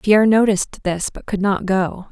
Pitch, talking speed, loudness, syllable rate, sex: 200 Hz, 200 wpm, -18 LUFS, 5.0 syllables/s, female